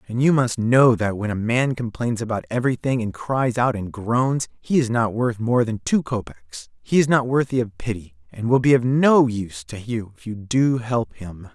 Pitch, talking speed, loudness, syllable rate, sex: 115 Hz, 220 wpm, -21 LUFS, 4.8 syllables/s, male